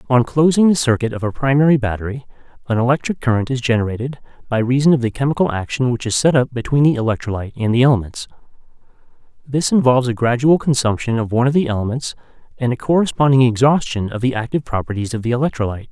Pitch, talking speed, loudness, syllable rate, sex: 125 Hz, 190 wpm, -17 LUFS, 7.0 syllables/s, male